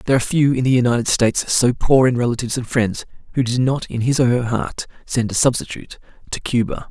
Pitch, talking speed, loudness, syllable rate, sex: 125 Hz, 225 wpm, -18 LUFS, 6.3 syllables/s, male